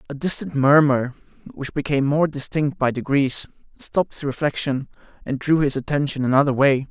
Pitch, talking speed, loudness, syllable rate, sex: 140 Hz, 155 wpm, -21 LUFS, 5.2 syllables/s, male